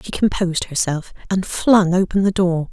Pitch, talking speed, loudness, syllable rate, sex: 185 Hz, 175 wpm, -18 LUFS, 4.9 syllables/s, female